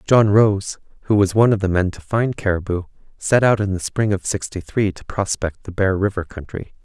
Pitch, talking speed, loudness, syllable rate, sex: 100 Hz, 220 wpm, -19 LUFS, 5.3 syllables/s, male